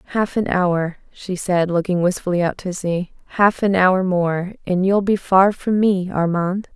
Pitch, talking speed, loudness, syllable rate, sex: 185 Hz, 185 wpm, -19 LUFS, 4.3 syllables/s, female